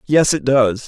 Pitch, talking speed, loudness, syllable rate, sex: 130 Hz, 205 wpm, -15 LUFS, 3.9 syllables/s, male